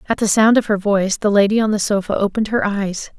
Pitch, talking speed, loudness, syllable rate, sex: 205 Hz, 265 wpm, -17 LUFS, 6.5 syllables/s, female